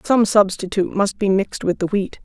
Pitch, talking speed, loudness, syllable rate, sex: 200 Hz, 215 wpm, -19 LUFS, 5.6 syllables/s, female